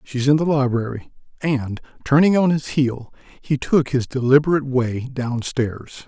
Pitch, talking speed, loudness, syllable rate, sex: 135 Hz, 160 wpm, -20 LUFS, 4.4 syllables/s, male